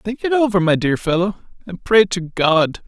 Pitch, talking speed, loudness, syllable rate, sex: 190 Hz, 210 wpm, -17 LUFS, 4.7 syllables/s, male